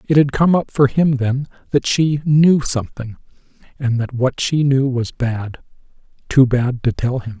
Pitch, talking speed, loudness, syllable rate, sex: 130 Hz, 180 wpm, -17 LUFS, 4.4 syllables/s, male